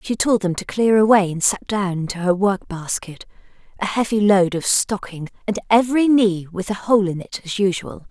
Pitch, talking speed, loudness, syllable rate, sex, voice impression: 200 Hz, 205 wpm, -19 LUFS, 4.9 syllables/s, female, feminine, slightly adult-like, slightly soft, slightly cute, calm, slightly friendly